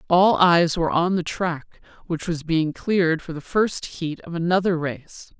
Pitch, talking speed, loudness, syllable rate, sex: 170 Hz, 190 wpm, -22 LUFS, 4.3 syllables/s, female